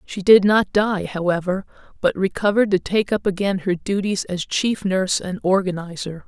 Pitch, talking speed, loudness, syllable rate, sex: 190 Hz, 170 wpm, -20 LUFS, 5.0 syllables/s, female